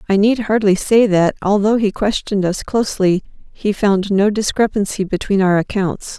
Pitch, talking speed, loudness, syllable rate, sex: 200 Hz, 165 wpm, -16 LUFS, 4.9 syllables/s, female